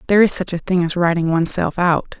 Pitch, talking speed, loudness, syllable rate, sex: 175 Hz, 245 wpm, -17 LUFS, 6.5 syllables/s, female